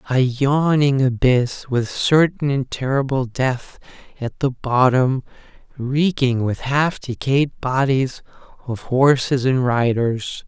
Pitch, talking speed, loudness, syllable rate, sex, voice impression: 130 Hz, 115 wpm, -19 LUFS, 3.5 syllables/s, male, masculine, adult-like, weak, slightly bright, fluent, slightly intellectual, slightly friendly, unique, modest